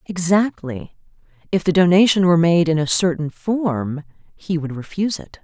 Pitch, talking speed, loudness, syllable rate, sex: 170 Hz, 155 wpm, -18 LUFS, 4.9 syllables/s, female